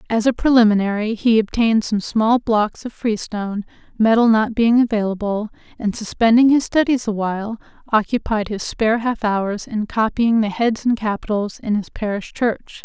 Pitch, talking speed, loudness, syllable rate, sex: 220 Hz, 160 wpm, -18 LUFS, 5.0 syllables/s, female